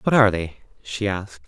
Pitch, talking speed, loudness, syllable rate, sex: 95 Hz, 205 wpm, -22 LUFS, 6.1 syllables/s, male